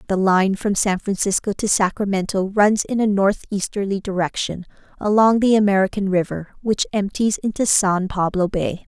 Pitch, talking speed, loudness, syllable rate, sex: 200 Hz, 155 wpm, -19 LUFS, 4.9 syllables/s, female